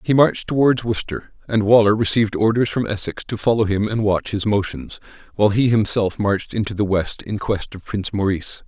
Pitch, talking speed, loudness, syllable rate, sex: 105 Hz, 200 wpm, -19 LUFS, 5.8 syllables/s, male